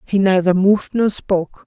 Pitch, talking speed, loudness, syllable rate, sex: 195 Hz, 180 wpm, -16 LUFS, 5.1 syllables/s, female